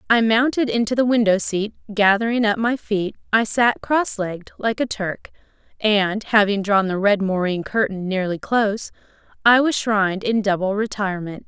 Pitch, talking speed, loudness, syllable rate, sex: 210 Hz, 165 wpm, -20 LUFS, 4.9 syllables/s, female